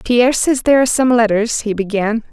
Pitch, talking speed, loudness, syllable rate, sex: 235 Hz, 205 wpm, -14 LUFS, 6.0 syllables/s, female